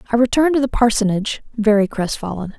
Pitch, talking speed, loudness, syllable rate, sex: 225 Hz, 165 wpm, -18 LUFS, 6.9 syllables/s, female